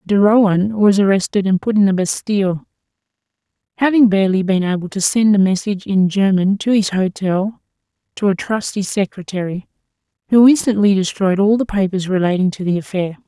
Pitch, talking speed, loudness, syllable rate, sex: 195 Hz, 165 wpm, -16 LUFS, 5.6 syllables/s, female